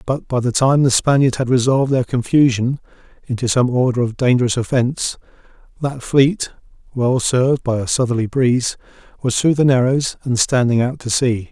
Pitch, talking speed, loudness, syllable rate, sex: 125 Hz, 170 wpm, -17 LUFS, 5.3 syllables/s, male